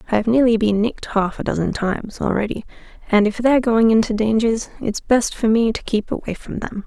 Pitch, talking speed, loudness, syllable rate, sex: 220 Hz, 210 wpm, -19 LUFS, 5.8 syllables/s, female